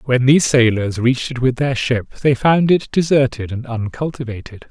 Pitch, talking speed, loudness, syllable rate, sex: 125 Hz, 180 wpm, -17 LUFS, 5.2 syllables/s, male